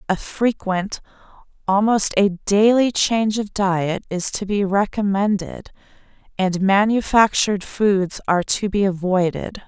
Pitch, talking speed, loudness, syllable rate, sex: 200 Hz, 105 wpm, -19 LUFS, 4.1 syllables/s, female